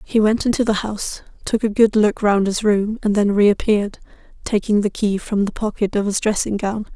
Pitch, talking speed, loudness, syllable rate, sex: 210 Hz, 215 wpm, -19 LUFS, 5.2 syllables/s, female